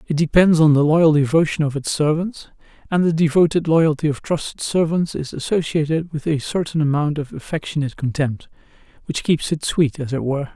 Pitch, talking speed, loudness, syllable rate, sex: 155 Hz, 180 wpm, -19 LUFS, 5.5 syllables/s, male